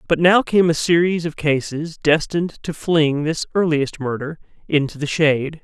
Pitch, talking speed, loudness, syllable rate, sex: 155 Hz, 170 wpm, -19 LUFS, 4.7 syllables/s, male